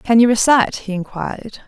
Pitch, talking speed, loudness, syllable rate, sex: 215 Hz, 180 wpm, -16 LUFS, 5.6 syllables/s, female